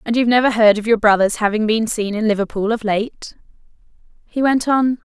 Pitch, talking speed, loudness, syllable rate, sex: 225 Hz, 200 wpm, -17 LUFS, 5.7 syllables/s, female